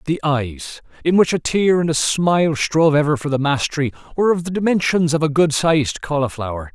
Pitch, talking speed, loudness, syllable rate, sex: 155 Hz, 195 wpm, -18 LUFS, 5.8 syllables/s, male